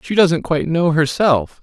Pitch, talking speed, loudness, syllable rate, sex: 160 Hz, 185 wpm, -16 LUFS, 4.6 syllables/s, male